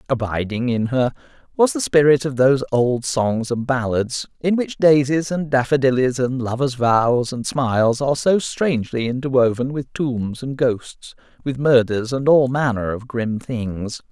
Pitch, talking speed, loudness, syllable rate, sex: 130 Hz, 160 wpm, -19 LUFS, 4.4 syllables/s, male